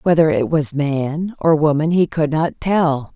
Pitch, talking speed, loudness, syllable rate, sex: 155 Hz, 190 wpm, -17 LUFS, 4.0 syllables/s, female